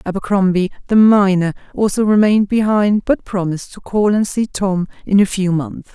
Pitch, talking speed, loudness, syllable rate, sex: 200 Hz, 170 wpm, -15 LUFS, 5.2 syllables/s, female